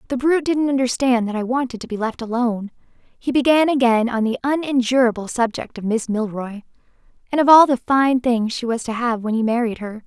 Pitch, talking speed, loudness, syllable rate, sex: 245 Hz, 210 wpm, -19 LUFS, 5.7 syllables/s, female